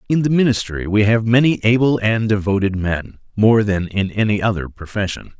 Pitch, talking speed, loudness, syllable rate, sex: 105 Hz, 165 wpm, -17 LUFS, 5.2 syllables/s, male